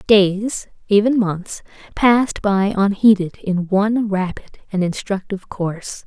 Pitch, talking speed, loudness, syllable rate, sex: 200 Hz, 120 wpm, -18 LUFS, 4.3 syllables/s, female